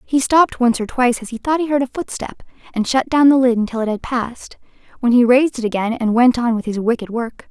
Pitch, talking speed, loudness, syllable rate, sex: 245 Hz, 265 wpm, -17 LUFS, 6.2 syllables/s, female